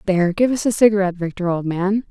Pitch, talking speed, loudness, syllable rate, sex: 195 Hz, 230 wpm, -18 LUFS, 6.7 syllables/s, female